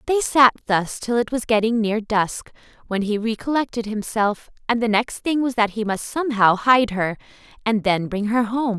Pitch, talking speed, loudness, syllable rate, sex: 225 Hz, 200 wpm, -21 LUFS, 4.8 syllables/s, female